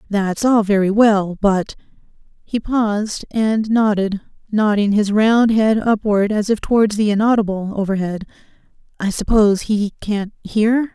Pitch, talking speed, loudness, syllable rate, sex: 210 Hz, 130 wpm, -17 LUFS, 4.4 syllables/s, female